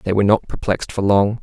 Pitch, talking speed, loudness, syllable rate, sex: 100 Hz, 250 wpm, -18 LUFS, 6.5 syllables/s, male